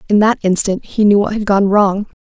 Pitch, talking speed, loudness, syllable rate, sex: 205 Hz, 240 wpm, -14 LUFS, 5.4 syllables/s, female